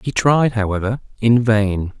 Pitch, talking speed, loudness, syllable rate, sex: 110 Hz, 150 wpm, -17 LUFS, 4.2 syllables/s, male